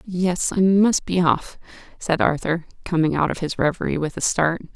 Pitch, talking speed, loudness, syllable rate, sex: 170 Hz, 190 wpm, -21 LUFS, 4.8 syllables/s, female